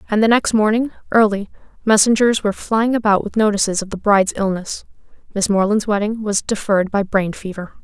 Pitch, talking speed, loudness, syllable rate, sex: 210 Hz, 170 wpm, -17 LUFS, 6.0 syllables/s, female